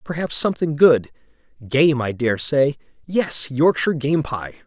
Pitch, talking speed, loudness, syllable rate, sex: 145 Hz, 115 wpm, -19 LUFS, 4.4 syllables/s, male